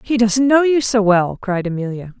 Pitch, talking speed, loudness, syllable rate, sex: 220 Hz, 220 wpm, -16 LUFS, 4.9 syllables/s, female